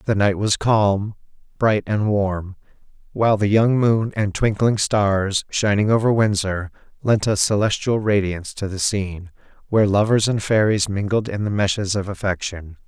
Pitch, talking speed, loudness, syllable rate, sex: 100 Hz, 160 wpm, -20 LUFS, 4.7 syllables/s, male